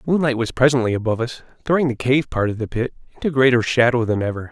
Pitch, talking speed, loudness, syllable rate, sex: 125 Hz, 225 wpm, -19 LUFS, 6.9 syllables/s, male